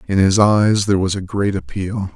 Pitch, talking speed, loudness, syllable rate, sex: 100 Hz, 225 wpm, -17 LUFS, 5.1 syllables/s, male